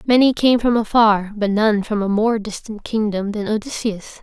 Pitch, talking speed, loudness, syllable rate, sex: 215 Hz, 185 wpm, -18 LUFS, 4.7 syllables/s, female